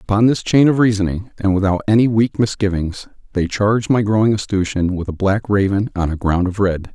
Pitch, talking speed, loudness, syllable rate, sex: 100 Hz, 205 wpm, -17 LUFS, 5.6 syllables/s, male